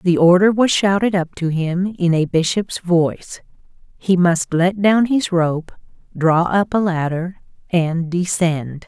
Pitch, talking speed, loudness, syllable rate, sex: 175 Hz, 150 wpm, -17 LUFS, 3.8 syllables/s, female